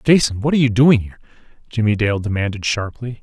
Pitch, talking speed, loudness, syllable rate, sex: 115 Hz, 185 wpm, -17 LUFS, 6.5 syllables/s, male